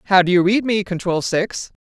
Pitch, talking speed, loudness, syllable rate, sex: 190 Hz, 230 wpm, -18 LUFS, 5.2 syllables/s, female